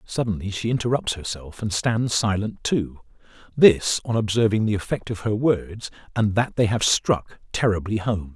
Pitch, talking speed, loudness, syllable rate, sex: 105 Hz, 160 wpm, -22 LUFS, 4.7 syllables/s, male